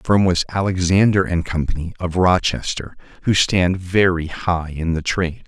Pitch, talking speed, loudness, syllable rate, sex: 90 Hz, 165 wpm, -19 LUFS, 4.8 syllables/s, male